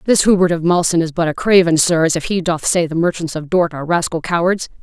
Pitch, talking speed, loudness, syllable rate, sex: 170 Hz, 250 wpm, -16 LUFS, 5.9 syllables/s, female